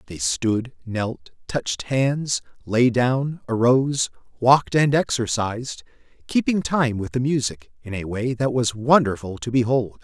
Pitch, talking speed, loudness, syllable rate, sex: 125 Hz, 145 wpm, -22 LUFS, 4.2 syllables/s, male